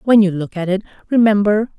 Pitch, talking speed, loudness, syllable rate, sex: 200 Hz, 200 wpm, -16 LUFS, 5.7 syllables/s, female